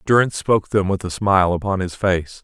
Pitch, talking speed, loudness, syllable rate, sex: 95 Hz, 220 wpm, -19 LUFS, 6.0 syllables/s, male